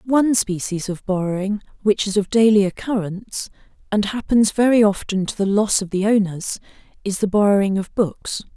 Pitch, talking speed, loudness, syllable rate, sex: 205 Hz, 170 wpm, -19 LUFS, 5.2 syllables/s, female